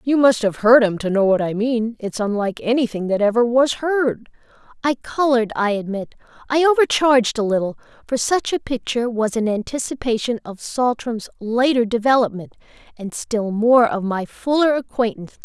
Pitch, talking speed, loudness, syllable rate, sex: 235 Hz, 170 wpm, -19 LUFS, 5.4 syllables/s, female